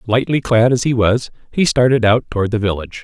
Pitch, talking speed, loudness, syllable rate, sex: 115 Hz, 220 wpm, -16 LUFS, 6.1 syllables/s, male